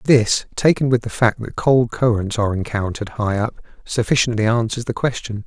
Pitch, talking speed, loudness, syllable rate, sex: 115 Hz, 175 wpm, -19 LUFS, 5.5 syllables/s, male